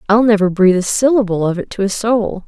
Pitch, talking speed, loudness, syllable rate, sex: 205 Hz, 245 wpm, -14 LUFS, 6.1 syllables/s, female